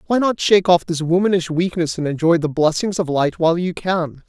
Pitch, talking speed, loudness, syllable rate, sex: 170 Hz, 225 wpm, -18 LUFS, 5.6 syllables/s, male